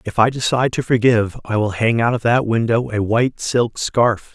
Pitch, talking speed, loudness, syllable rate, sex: 115 Hz, 220 wpm, -18 LUFS, 5.3 syllables/s, male